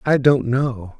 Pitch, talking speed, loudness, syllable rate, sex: 130 Hz, 180 wpm, -18 LUFS, 3.4 syllables/s, male